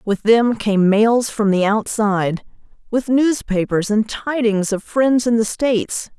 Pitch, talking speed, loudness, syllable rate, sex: 220 Hz, 155 wpm, -17 LUFS, 4.0 syllables/s, female